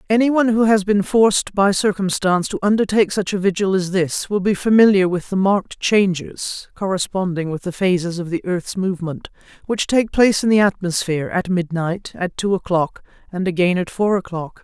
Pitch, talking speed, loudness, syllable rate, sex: 190 Hz, 185 wpm, -18 LUFS, 4.7 syllables/s, female